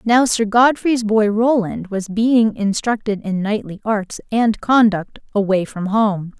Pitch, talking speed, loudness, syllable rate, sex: 215 Hz, 150 wpm, -17 LUFS, 3.9 syllables/s, female